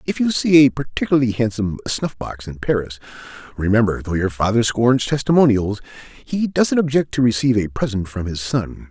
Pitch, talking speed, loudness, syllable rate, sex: 120 Hz, 160 wpm, -19 LUFS, 5.5 syllables/s, male